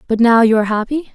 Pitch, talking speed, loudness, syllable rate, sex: 235 Hz, 260 wpm, -14 LUFS, 7.1 syllables/s, female